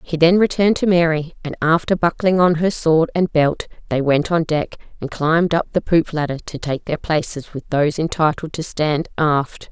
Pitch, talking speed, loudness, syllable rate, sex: 160 Hz, 205 wpm, -18 LUFS, 5.0 syllables/s, female